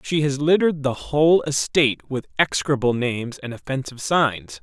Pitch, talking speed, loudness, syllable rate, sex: 135 Hz, 155 wpm, -21 LUFS, 5.4 syllables/s, male